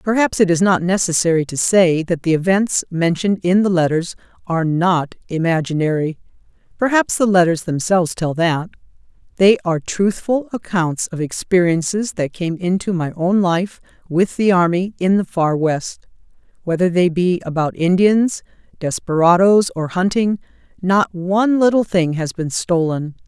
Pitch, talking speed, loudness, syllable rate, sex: 180 Hz, 140 wpm, -17 LUFS, 4.7 syllables/s, female